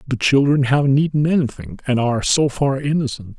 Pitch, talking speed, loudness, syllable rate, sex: 135 Hz, 195 wpm, -18 LUFS, 6.0 syllables/s, male